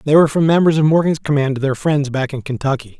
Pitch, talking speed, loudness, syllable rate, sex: 145 Hz, 260 wpm, -16 LUFS, 6.7 syllables/s, male